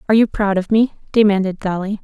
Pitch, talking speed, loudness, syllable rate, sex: 200 Hz, 205 wpm, -17 LUFS, 6.6 syllables/s, female